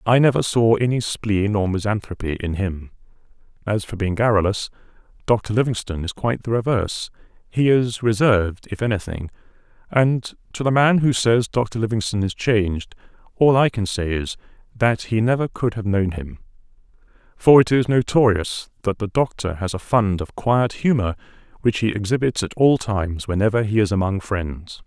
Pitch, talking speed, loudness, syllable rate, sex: 110 Hz, 165 wpm, -20 LUFS, 5.1 syllables/s, male